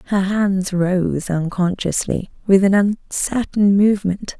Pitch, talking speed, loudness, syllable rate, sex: 195 Hz, 110 wpm, -18 LUFS, 3.8 syllables/s, female